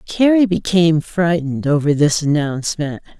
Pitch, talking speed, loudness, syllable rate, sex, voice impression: 160 Hz, 115 wpm, -16 LUFS, 5.1 syllables/s, female, feminine, middle-aged, slightly tensed, powerful, halting, slightly raspy, intellectual, calm, slightly friendly, elegant, lively, slightly strict, slightly sharp